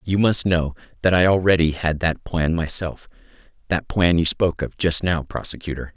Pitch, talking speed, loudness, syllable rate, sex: 85 Hz, 180 wpm, -20 LUFS, 5.1 syllables/s, male